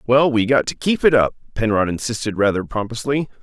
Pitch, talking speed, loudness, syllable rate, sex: 120 Hz, 195 wpm, -19 LUFS, 5.7 syllables/s, male